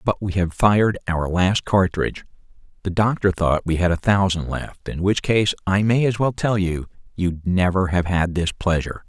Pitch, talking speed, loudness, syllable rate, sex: 95 Hz, 185 wpm, -20 LUFS, 4.8 syllables/s, male